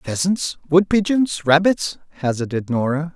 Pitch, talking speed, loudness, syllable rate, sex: 160 Hz, 95 wpm, -19 LUFS, 4.3 syllables/s, male